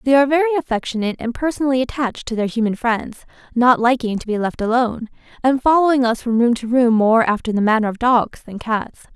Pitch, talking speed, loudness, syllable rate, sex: 240 Hz, 210 wpm, -18 LUFS, 6.2 syllables/s, female